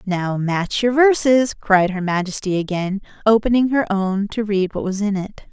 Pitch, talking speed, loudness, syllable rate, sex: 205 Hz, 185 wpm, -19 LUFS, 4.6 syllables/s, female